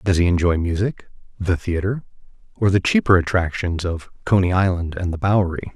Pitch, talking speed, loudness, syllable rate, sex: 90 Hz, 165 wpm, -20 LUFS, 5.6 syllables/s, male